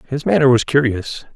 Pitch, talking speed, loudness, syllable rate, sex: 135 Hz, 175 wpm, -16 LUFS, 5.4 syllables/s, male